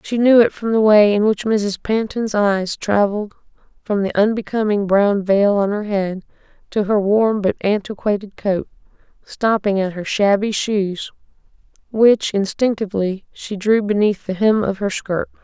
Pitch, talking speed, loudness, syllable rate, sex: 205 Hz, 160 wpm, -18 LUFS, 4.4 syllables/s, female